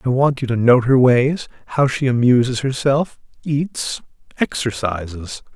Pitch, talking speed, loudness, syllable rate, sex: 125 Hz, 140 wpm, -18 LUFS, 4.3 syllables/s, male